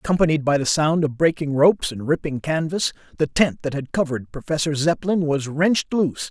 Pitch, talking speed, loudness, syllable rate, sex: 150 Hz, 190 wpm, -21 LUFS, 5.7 syllables/s, male